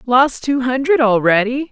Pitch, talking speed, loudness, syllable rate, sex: 255 Hz, 140 wpm, -15 LUFS, 4.4 syllables/s, female